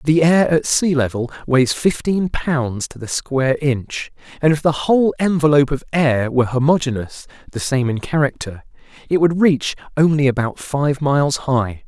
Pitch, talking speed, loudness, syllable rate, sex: 140 Hz, 150 wpm, -18 LUFS, 4.8 syllables/s, male